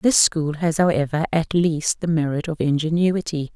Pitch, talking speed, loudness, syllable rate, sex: 160 Hz, 170 wpm, -21 LUFS, 4.7 syllables/s, female